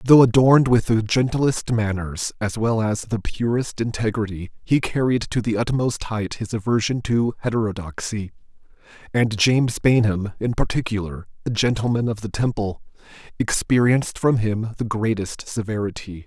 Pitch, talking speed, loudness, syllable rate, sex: 115 Hz, 140 wpm, -21 LUFS, 4.9 syllables/s, male